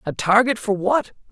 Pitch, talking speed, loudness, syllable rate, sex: 215 Hz, 185 wpm, -19 LUFS, 4.8 syllables/s, female